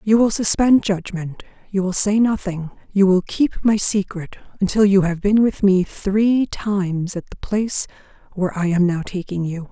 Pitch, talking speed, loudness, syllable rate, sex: 195 Hz, 185 wpm, -19 LUFS, 4.7 syllables/s, female